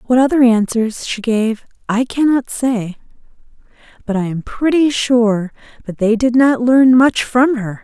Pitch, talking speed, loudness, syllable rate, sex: 240 Hz, 160 wpm, -15 LUFS, 4.1 syllables/s, female